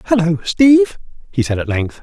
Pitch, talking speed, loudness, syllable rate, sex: 155 Hz, 175 wpm, -15 LUFS, 5.3 syllables/s, male